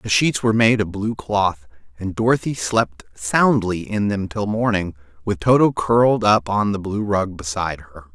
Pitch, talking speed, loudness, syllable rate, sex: 100 Hz, 185 wpm, -19 LUFS, 4.6 syllables/s, male